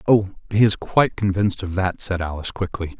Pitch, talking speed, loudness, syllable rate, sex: 95 Hz, 200 wpm, -21 LUFS, 6.0 syllables/s, male